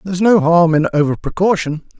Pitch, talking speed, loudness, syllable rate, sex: 175 Hz, 210 wpm, -14 LUFS, 6.4 syllables/s, male